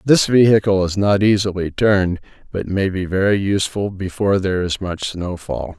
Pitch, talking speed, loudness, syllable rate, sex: 95 Hz, 165 wpm, -18 LUFS, 5.2 syllables/s, male